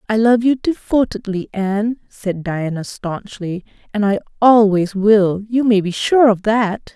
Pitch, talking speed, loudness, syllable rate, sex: 210 Hz, 155 wpm, -17 LUFS, 4.1 syllables/s, female